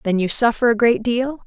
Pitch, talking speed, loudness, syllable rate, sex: 235 Hz, 245 wpm, -17 LUFS, 5.3 syllables/s, female